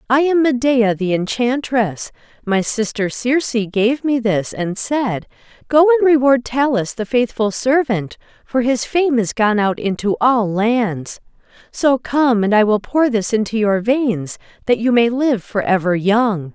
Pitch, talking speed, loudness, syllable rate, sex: 230 Hz, 165 wpm, -17 LUFS, 4.0 syllables/s, female